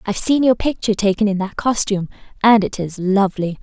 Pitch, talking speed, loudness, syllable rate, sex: 205 Hz, 200 wpm, -17 LUFS, 6.3 syllables/s, female